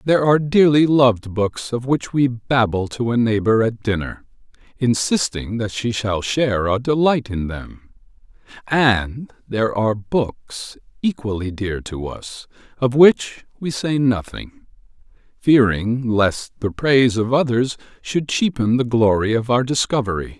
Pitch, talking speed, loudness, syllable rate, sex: 120 Hz, 145 wpm, -19 LUFS, 4.2 syllables/s, male